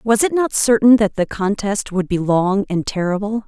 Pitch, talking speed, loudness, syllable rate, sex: 205 Hz, 205 wpm, -17 LUFS, 4.7 syllables/s, female